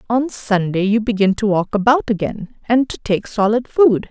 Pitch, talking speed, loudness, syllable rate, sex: 220 Hz, 175 wpm, -17 LUFS, 4.5 syllables/s, female